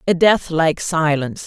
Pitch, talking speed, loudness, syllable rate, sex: 165 Hz, 125 wpm, -17 LUFS, 5.3 syllables/s, female